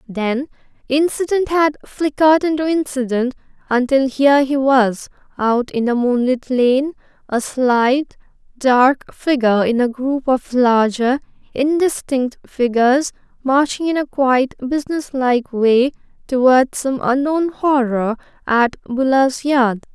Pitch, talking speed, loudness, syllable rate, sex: 265 Hz, 115 wpm, -17 LUFS, 3.9 syllables/s, female